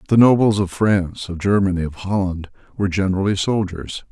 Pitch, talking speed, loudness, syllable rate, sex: 95 Hz, 160 wpm, -19 LUFS, 5.8 syllables/s, male